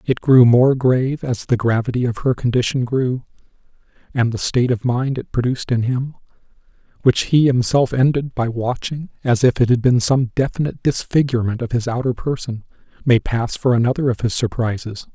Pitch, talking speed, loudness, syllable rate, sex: 125 Hz, 180 wpm, -18 LUFS, 5.4 syllables/s, male